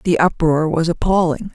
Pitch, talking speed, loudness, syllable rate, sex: 165 Hz, 155 wpm, -17 LUFS, 4.9 syllables/s, female